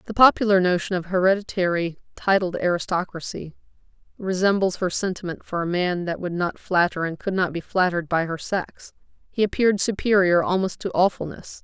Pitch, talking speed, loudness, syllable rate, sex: 185 Hz, 160 wpm, -22 LUFS, 5.5 syllables/s, female